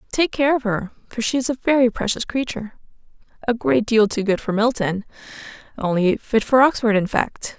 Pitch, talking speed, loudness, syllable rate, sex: 230 Hz, 175 wpm, -20 LUFS, 5.4 syllables/s, female